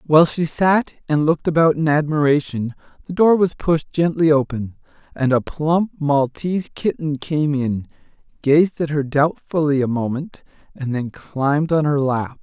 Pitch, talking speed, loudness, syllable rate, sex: 150 Hz, 160 wpm, -19 LUFS, 4.6 syllables/s, male